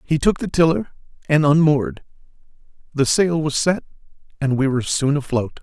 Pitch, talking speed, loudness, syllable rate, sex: 145 Hz, 160 wpm, -19 LUFS, 5.4 syllables/s, male